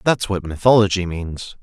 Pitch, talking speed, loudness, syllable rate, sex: 95 Hz, 150 wpm, -18 LUFS, 4.7 syllables/s, male